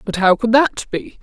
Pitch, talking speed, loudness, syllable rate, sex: 235 Hz, 245 wpm, -16 LUFS, 4.6 syllables/s, female